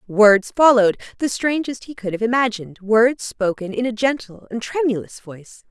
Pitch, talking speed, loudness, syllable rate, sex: 225 Hz, 170 wpm, -19 LUFS, 5.2 syllables/s, female